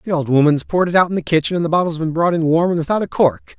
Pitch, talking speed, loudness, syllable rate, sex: 165 Hz, 335 wpm, -17 LUFS, 7.2 syllables/s, male